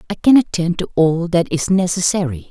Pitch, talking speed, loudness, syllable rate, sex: 170 Hz, 190 wpm, -16 LUFS, 5.4 syllables/s, female